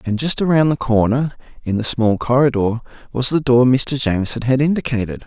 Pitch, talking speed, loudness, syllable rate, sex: 125 Hz, 180 wpm, -17 LUFS, 5.5 syllables/s, male